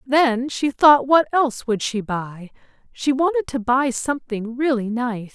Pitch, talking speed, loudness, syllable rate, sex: 255 Hz, 170 wpm, -20 LUFS, 4.2 syllables/s, female